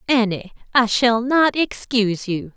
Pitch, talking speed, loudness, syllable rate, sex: 230 Hz, 140 wpm, -19 LUFS, 4.2 syllables/s, female